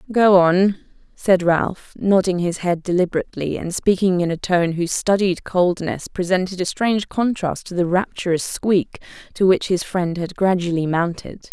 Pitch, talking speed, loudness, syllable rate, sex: 180 Hz, 160 wpm, -19 LUFS, 4.8 syllables/s, female